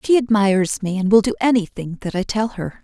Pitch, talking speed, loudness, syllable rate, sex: 205 Hz, 235 wpm, -19 LUFS, 5.7 syllables/s, female